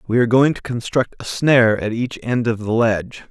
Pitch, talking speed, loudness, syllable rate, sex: 120 Hz, 235 wpm, -18 LUFS, 5.6 syllables/s, male